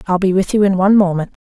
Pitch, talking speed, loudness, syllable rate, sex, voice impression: 190 Hz, 290 wpm, -14 LUFS, 7.5 syllables/s, female, very feminine, very adult-like, slightly middle-aged, slightly thin, relaxed, weak, slightly dark, hard, slightly clear, fluent, slightly raspy, cute, very intellectual, slightly refreshing, very sincere, very calm, very friendly, very reassuring, very unique, elegant, slightly wild, very sweet, slightly lively, kind, slightly intense, modest, slightly light